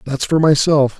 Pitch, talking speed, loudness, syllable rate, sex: 145 Hz, 180 wpm, -14 LUFS, 4.7 syllables/s, male